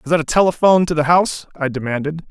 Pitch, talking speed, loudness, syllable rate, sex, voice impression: 160 Hz, 235 wpm, -16 LUFS, 7.4 syllables/s, male, very masculine, slightly old, very thick, tensed, slightly powerful, very bright, hard, very clear, very fluent, cool, intellectual, refreshing, sincere, slightly calm, very mature, very friendly, very reassuring, very unique, elegant, slightly wild, sweet, very lively, kind, slightly modest